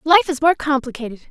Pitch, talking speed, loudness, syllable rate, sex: 290 Hz, 185 wpm, -17 LUFS, 6.2 syllables/s, female